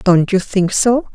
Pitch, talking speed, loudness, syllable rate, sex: 200 Hz, 210 wpm, -15 LUFS, 3.6 syllables/s, female